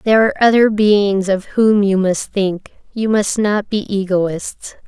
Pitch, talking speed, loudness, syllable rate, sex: 200 Hz, 170 wpm, -15 LUFS, 4.1 syllables/s, female